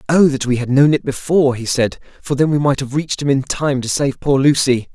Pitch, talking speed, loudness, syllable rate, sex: 135 Hz, 265 wpm, -16 LUFS, 5.7 syllables/s, male